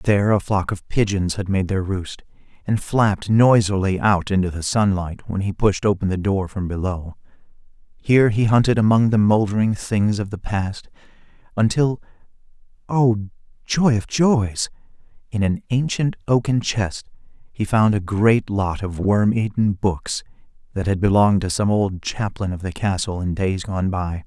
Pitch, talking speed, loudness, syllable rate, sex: 100 Hz, 165 wpm, -20 LUFS, 4.6 syllables/s, male